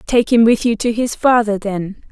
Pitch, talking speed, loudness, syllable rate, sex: 225 Hz, 225 wpm, -15 LUFS, 4.6 syllables/s, female